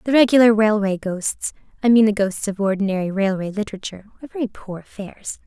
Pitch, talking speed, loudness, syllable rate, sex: 210 Hz, 155 wpm, -19 LUFS, 6.2 syllables/s, female